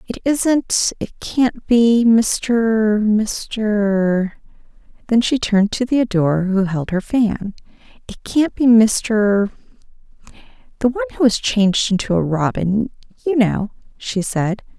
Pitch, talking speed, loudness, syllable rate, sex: 215 Hz, 135 wpm, -17 LUFS, 3.6 syllables/s, female